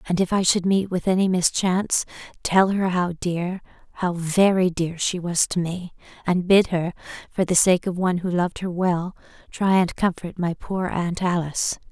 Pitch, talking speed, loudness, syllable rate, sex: 180 Hz, 190 wpm, -22 LUFS, 4.8 syllables/s, female